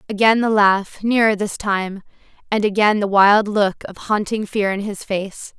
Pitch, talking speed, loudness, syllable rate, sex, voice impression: 205 Hz, 185 wpm, -18 LUFS, 4.3 syllables/s, female, feminine, adult-like, tensed, refreshing, elegant, slightly lively